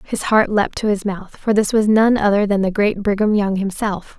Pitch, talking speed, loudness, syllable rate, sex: 205 Hz, 245 wpm, -17 LUFS, 4.9 syllables/s, female